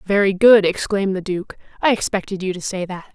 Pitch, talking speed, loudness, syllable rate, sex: 195 Hz, 210 wpm, -18 LUFS, 5.8 syllables/s, female